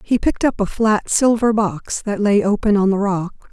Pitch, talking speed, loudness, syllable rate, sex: 210 Hz, 220 wpm, -17 LUFS, 4.9 syllables/s, female